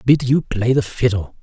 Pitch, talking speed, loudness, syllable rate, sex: 115 Hz, 210 wpm, -18 LUFS, 4.8 syllables/s, male